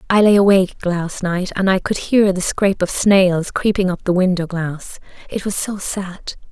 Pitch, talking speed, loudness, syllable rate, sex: 185 Hz, 205 wpm, -17 LUFS, 4.6 syllables/s, female